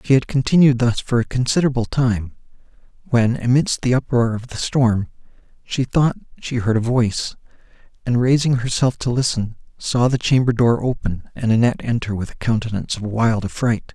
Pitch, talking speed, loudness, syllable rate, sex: 120 Hz, 170 wpm, -19 LUFS, 5.3 syllables/s, male